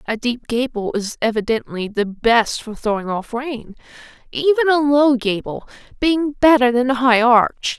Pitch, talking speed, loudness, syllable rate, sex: 245 Hz, 160 wpm, -18 LUFS, 4.3 syllables/s, female